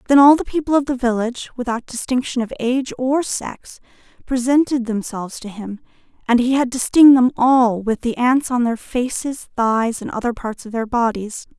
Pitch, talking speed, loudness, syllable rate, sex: 245 Hz, 190 wpm, -18 LUFS, 5.1 syllables/s, female